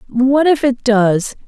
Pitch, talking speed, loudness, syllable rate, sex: 250 Hz, 165 wpm, -14 LUFS, 3.3 syllables/s, female